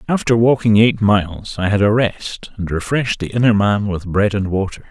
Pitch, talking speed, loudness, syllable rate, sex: 105 Hz, 210 wpm, -16 LUFS, 5.1 syllables/s, male